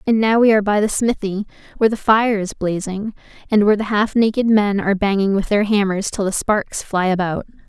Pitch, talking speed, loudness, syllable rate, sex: 205 Hz, 220 wpm, -18 LUFS, 5.7 syllables/s, female